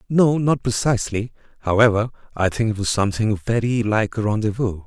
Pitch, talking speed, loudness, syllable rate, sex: 110 Hz, 160 wpm, -20 LUFS, 5.6 syllables/s, male